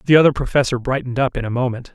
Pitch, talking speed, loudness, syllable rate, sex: 125 Hz, 245 wpm, -18 LUFS, 7.8 syllables/s, male